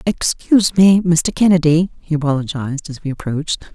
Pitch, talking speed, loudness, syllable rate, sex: 160 Hz, 145 wpm, -16 LUFS, 5.5 syllables/s, female